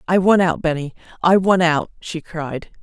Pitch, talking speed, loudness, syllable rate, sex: 170 Hz, 170 wpm, -18 LUFS, 4.5 syllables/s, female